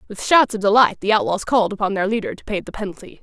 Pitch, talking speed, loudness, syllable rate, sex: 205 Hz, 260 wpm, -19 LUFS, 6.9 syllables/s, female